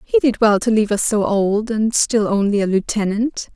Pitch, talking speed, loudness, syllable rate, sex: 215 Hz, 220 wpm, -17 LUFS, 5.0 syllables/s, female